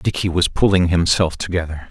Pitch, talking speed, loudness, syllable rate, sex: 85 Hz, 155 wpm, -18 LUFS, 5.4 syllables/s, male